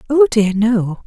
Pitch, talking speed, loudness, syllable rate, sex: 225 Hz, 170 wpm, -15 LUFS, 3.6 syllables/s, female